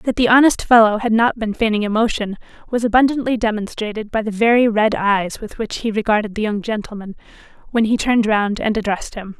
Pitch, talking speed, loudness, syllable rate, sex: 220 Hz, 200 wpm, -17 LUFS, 5.9 syllables/s, female